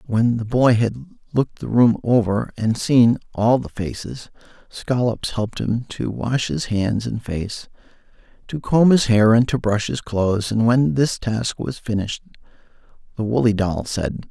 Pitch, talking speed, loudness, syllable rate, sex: 115 Hz, 170 wpm, -20 LUFS, 4.3 syllables/s, male